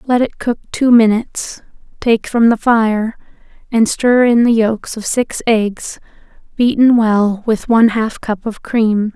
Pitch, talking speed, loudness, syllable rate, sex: 225 Hz, 165 wpm, -14 LUFS, 3.9 syllables/s, female